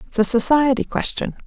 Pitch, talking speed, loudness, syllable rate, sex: 255 Hz, 165 wpm, -18 LUFS, 5.8 syllables/s, female